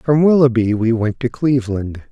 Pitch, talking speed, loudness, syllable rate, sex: 120 Hz, 170 wpm, -16 LUFS, 5.0 syllables/s, male